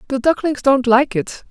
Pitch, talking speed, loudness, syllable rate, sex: 265 Hz, 200 wpm, -16 LUFS, 4.7 syllables/s, female